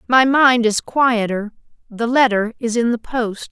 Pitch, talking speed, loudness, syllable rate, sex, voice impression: 235 Hz, 155 wpm, -17 LUFS, 4.1 syllables/s, female, feminine, slightly adult-like, tensed, slightly powerful, slightly clear, slightly sincere, slightly friendly, slightly unique